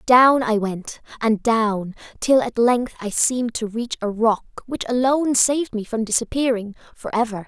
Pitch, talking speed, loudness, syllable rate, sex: 230 Hz, 175 wpm, -20 LUFS, 4.7 syllables/s, female